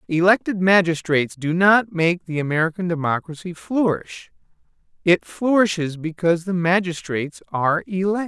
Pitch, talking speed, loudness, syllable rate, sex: 175 Hz, 115 wpm, -20 LUFS, 5.3 syllables/s, male